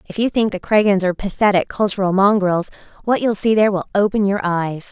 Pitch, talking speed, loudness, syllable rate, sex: 200 Hz, 210 wpm, -17 LUFS, 6.0 syllables/s, female